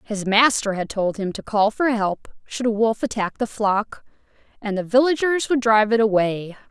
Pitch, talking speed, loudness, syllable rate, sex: 220 Hz, 195 wpm, -20 LUFS, 4.8 syllables/s, female